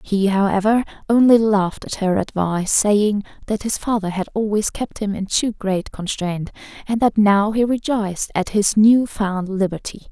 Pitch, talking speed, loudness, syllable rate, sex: 205 Hz, 170 wpm, -19 LUFS, 4.7 syllables/s, female